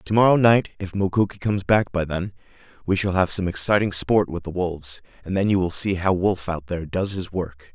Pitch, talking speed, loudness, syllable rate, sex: 95 Hz, 230 wpm, -22 LUFS, 5.6 syllables/s, male